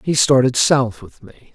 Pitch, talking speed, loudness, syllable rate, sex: 130 Hz, 195 wpm, -15 LUFS, 4.8 syllables/s, male